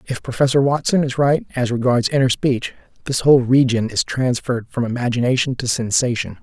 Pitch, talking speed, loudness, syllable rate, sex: 125 Hz, 170 wpm, -18 LUFS, 5.6 syllables/s, male